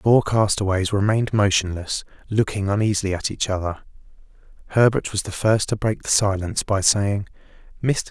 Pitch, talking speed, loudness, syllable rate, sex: 100 Hz, 155 wpm, -21 LUFS, 5.5 syllables/s, male